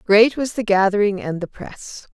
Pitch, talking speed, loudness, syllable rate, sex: 205 Hz, 195 wpm, -18 LUFS, 4.5 syllables/s, female